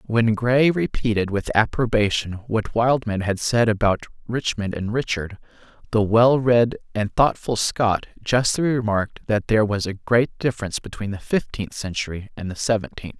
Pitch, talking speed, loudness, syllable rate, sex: 110 Hz, 155 wpm, -21 LUFS, 4.8 syllables/s, male